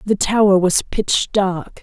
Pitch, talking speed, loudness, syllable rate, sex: 195 Hz, 165 wpm, -16 LUFS, 3.5 syllables/s, female